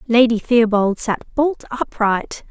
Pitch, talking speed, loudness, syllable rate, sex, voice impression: 235 Hz, 120 wpm, -18 LUFS, 3.9 syllables/s, female, slightly feminine, young, slightly halting, slightly cute, slightly friendly